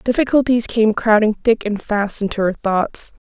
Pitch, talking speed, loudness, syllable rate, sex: 225 Hz, 165 wpm, -17 LUFS, 4.5 syllables/s, female